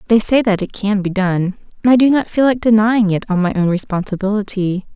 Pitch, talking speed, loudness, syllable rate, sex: 205 Hz, 230 wpm, -16 LUFS, 5.7 syllables/s, female